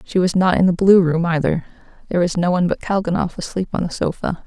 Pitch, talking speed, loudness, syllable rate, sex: 175 Hz, 240 wpm, -18 LUFS, 6.4 syllables/s, female